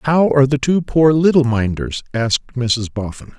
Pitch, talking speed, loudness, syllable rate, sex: 130 Hz, 175 wpm, -16 LUFS, 4.8 syllables/s, male